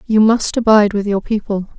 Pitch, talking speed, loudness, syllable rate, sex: 210 Hz, 200 wpm, -15 LUFS, 5.7 syllables/s, female